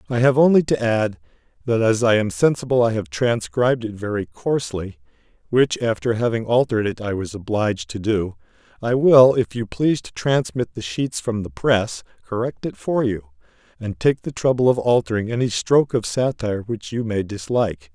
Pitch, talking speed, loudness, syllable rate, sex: 120 Hz, 185 wpm, -20 LUFS, 5.3 syllables/s, male